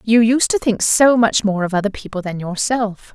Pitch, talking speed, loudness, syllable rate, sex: 215 Hz, 230 wpm, -17 LUFS, 4.9 syllables/s, female